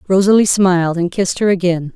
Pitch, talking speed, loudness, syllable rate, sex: 185 Hz, 185 wpm, -14 LUFS, 6.2 syllables/s, female